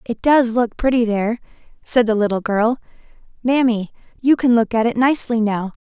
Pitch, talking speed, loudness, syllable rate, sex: 230 Hz, 175 wpm, -18 LUFS, 5.4 syllables/s, female